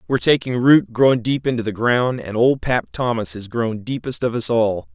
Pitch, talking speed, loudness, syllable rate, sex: 115 Hz, 220 wpm, -19 LUFS, 5.1 syllables/s, male